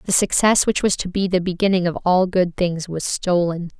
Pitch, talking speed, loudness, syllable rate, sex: 180 Hz, 220 wpm, -19 LUFS, 5.1 syllables/s, female